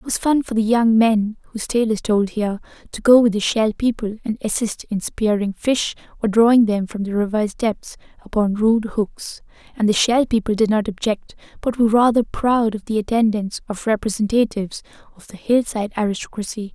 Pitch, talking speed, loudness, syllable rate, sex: 220 Hz, 190 wpm, -19 LUFS, 5.4 syllables/s, female